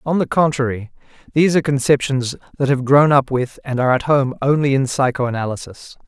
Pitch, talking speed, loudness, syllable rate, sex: 135 Hz, 180 wpm, -17 LUFS, 5.8 syllables/s, male